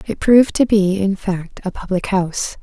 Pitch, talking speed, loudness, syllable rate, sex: 195 Hz, 205 wpm, -17 LUFS, 4.9 syllables/s, female